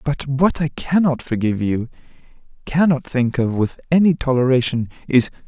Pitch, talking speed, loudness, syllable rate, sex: 135 Hz, 140 wpm, -19 LUFS, 5.0 syllables/s, male